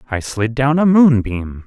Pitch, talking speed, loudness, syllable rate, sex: 125 Hz, 180 wpm, -15 LUFS, 4.1 syllables/s, male